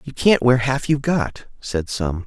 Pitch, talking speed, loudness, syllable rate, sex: 125 Hz, 210 wpm, -20 LUFS, 4.4 syllables/s, male